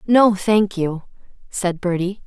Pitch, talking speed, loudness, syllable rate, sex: 190 Hz, 130 wpm, -19 LUFS, 3.5 syllables/s, female